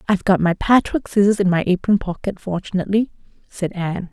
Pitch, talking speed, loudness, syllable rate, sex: 195 Hz, 175 wpm, -19 LUFS, 6.1 syllables/s, female